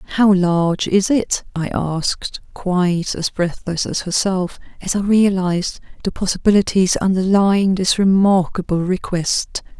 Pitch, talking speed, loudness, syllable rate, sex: 185 Hz, 120 wpm, -18 LUFS, 4.3 syllables/s, female